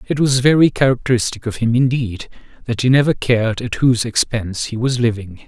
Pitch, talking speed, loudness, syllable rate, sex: 120 Hz, 185 wpm, -17 LUFS, 5.9 syllables/s, male